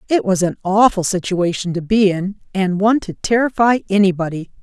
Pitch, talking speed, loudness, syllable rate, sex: 195 Hz, 170 wpm, -17 LUFS, 5.4 syllables/s, female